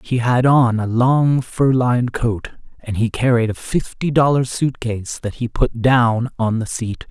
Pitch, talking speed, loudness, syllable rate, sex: 120 Hz, 195 wpm, -18 LUFS, 4.1 syllables/s, male